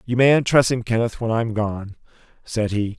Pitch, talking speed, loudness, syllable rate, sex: 115 Hz, 220 wpm, -20 LUFS, 5.4 syllables/s, male